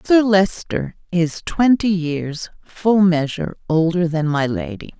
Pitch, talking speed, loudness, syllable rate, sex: 180 Hz, 130 wpm, -18 LUFS, 4.1 syllables/s, female